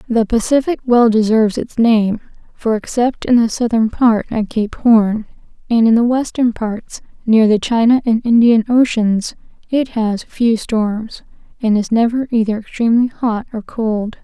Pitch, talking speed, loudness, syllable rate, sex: 225 Hz, 160 wpm, -15 LUFS, 4.4 syllables/s, female